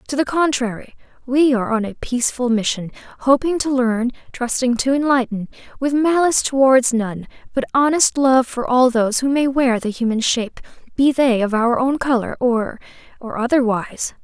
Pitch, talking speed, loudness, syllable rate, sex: 250 Hz, 160 wpm, -18 LUFS, 5.2 syllables/s, female